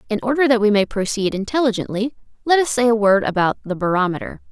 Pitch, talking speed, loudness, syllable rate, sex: 220 Hz, 200 wpm, -18 LUFS, 6.5 syllables/s, female